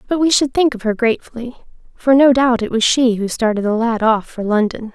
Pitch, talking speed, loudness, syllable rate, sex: 235 Hz, 245 wpm, -16 LUFS, 5.6 syllables/s, female